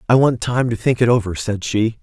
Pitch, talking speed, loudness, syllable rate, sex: 115 Hz, 265 wpm, -18 LUFS, 5.5 syllables/s, male